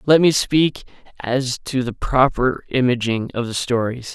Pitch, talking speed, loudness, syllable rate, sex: 125 Hz, 160 wpm, -19 LUFS, 4.2 syllables/s, male